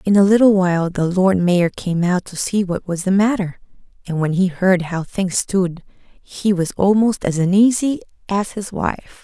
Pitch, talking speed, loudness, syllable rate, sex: 190 Hz, 195 wpm, -18 LUFS, 4.4 syllables/s, female